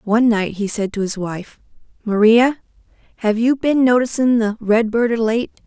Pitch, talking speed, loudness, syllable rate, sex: 225 Hz, 170 wpm, -17 LUFS, 4.7 syllables/s, female